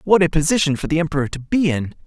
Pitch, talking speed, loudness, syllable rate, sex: 160 Hz, 260 wpm, -19 LUFS, 6.9 syllables/s, male